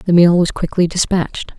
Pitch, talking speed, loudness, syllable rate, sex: 175 Hz, 190 wpm, -15 LUFS, 5.3 syllables/s, female